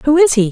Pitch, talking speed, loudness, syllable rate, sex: 275 Hz, 345 wpm, -12 LUFS, 6.8 syllables/s, female